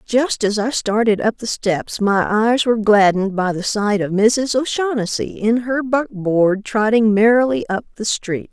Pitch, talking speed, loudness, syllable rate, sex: 220 Hz, 175 wpm, -17 LUFS, 4.4 syllables/s, female